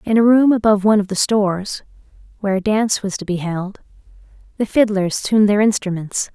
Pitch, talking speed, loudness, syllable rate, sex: 205 Hz, 190 wpm, -17 LUFS, 6.1 syllables/s, female